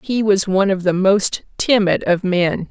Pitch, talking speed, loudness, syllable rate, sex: 195 Hz, 200 wpm, -17 LUFS, 4.4 syllables/s, female